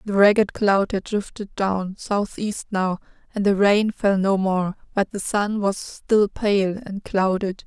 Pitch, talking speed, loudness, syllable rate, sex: 200 Hz, 170 wpm, -22 LUFS, 3.8 syllables/s, female